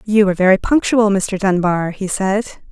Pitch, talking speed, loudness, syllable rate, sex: 195 Hz, 175 wpm, -16 LUFS, 5.0 syllables/s, female